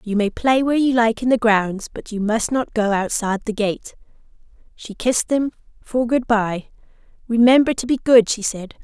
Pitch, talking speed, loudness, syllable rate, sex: 230 Hz, 195 wpm, -19 LUFS, 5.1 syllables/s, female